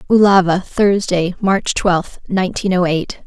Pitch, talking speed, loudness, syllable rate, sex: 185 Hz, 130 wpm, -16 LUFS, 4.1 syllables/s, female